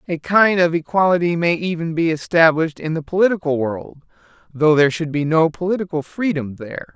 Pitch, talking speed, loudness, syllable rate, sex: 165 Hz, 175 wpm, -18 LUFS, 5.7 syllables/s, male